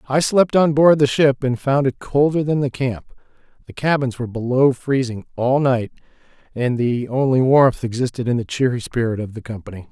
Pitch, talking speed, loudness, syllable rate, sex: 130 Hz, 190 wpm, -18 LUFS, 5.2 syllables/s, male